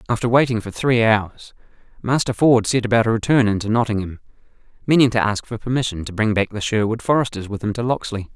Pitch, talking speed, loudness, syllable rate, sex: 115 Hz, 200 wpm, -19 LUFS, 6.1 syllables/s, male